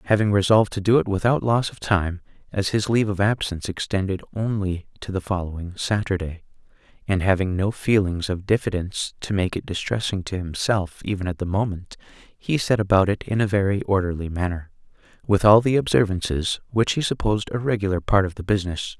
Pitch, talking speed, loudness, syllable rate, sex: 100 Hz, 185 wpm, -22 LUFS, 5.8 syllables/s, male